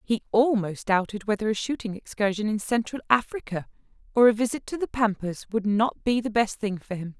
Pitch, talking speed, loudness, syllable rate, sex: 220 Hz, 200 wpm, -25 LUFS, 5.5 syllables/s, female